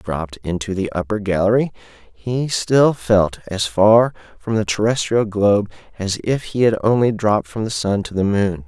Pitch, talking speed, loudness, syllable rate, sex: 105 Hz, 195 wpm, -18 LUFS, 5.1 syllables/s, male